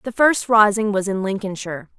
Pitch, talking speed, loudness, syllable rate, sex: 205 Hz, 180 wpm, -18 LUFS, 5.5 syllables/s, female